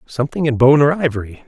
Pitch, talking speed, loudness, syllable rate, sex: 135 Hz, 205 wpm, -15 LUFS, 6.7 syllables/s, male